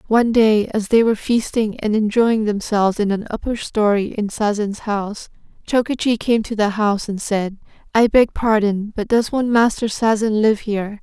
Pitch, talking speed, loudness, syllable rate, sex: 215 Hz, 180 wpm, -18 LUFS, 5.1 syllables/s, female